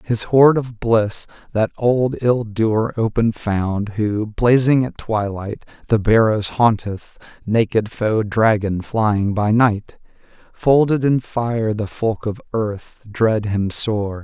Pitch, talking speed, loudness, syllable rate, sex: 110 Hz, 140 wpm, -18 LUFS, 3.3 syllables/s, male